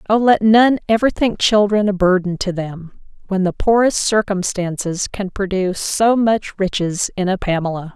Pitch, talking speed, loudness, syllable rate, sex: 195 Hz, 165 wpm, -17 LUFS, 4.6 syllables/s, female